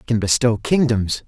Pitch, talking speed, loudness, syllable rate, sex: 115 Hz, 190 wpm, -18 LUFS, 4.9 syllables/s, male